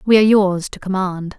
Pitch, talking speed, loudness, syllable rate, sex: 195 Hz, 215 wpm, -17 LUFS, 5.5 syllables/s, female